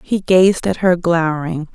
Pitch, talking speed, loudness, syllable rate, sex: 175 Hz, 170 wpm, -15 LUFS, 4.4 syllables/s, female